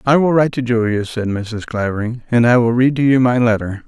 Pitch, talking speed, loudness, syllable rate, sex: 120 Hz, 250 wpm, -16 LUFS, 5.7 syllables/s, male